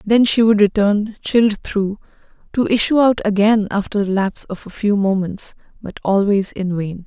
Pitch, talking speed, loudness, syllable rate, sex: 205 Hz, 180 wpm, -17 LUFS, 4.8 syllables/s, female